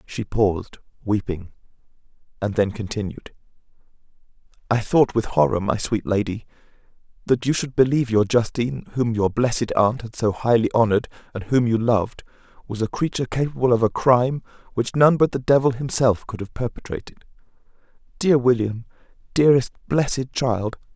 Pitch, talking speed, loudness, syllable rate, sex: 120 Hz, 150 wpm, -21 LUFS, 5.5 syllables/s, male